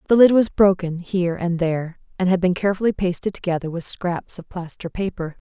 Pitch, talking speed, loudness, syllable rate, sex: 180 Hz, 195 wpm, -21 LUFS, 5.8 syllables/s, female